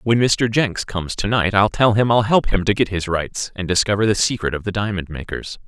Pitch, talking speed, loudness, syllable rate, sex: 105 Hz, 255 wpm, -19 LUFS, 5.5 syllables/s, male